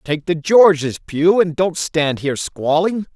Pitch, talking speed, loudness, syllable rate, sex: 165 Hz, 170 wpm, -16 LUFS, 4.1 syllables/s, male